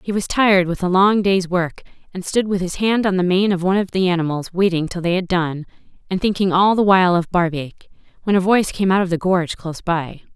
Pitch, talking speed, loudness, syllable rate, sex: 185 Hz, 250 wpm, -18 LUFS, 6.1 syllables/s, female